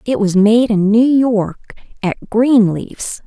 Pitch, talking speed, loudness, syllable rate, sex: 215 Hz, 145 wpm, -14 LUFS, 3.3 syllables/s, female